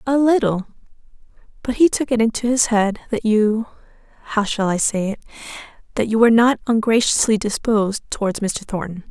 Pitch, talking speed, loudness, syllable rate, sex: 220 Hz, 150 wpm, -18 LUFS, 5.6 syllables/s, female